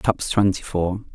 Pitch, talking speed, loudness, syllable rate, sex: 95 Hz, 155 wpm, -22 LUFS, 5.4 syllables/s, male